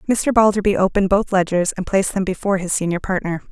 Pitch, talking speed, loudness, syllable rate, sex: 190 Hz, 205 wpm, -18 LUFS, 6.8 syllables/s, female